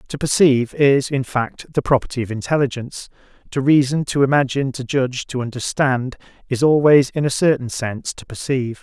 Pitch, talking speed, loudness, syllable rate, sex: 130 Hz, 170 wpm, -18 LUFS, 5.7 syllables/s, male